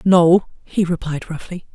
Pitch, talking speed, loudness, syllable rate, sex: 175 Hz, 135 wpm, -18 LUFS, 4.3 syllables/s, female